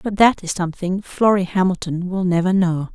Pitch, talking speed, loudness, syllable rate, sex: 185 Hz, 185 wpm, -19 LUFS, 5.3 syllables/s, female